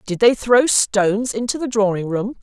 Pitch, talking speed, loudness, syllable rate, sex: 220 Hz, 200 wpm, -17 LUFS, 4.9 syllables/s, female